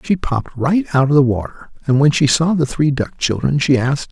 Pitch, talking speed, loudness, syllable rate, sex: 145 Hz, 250 wpm, -16 LUFS, 5.4 syllables/s, male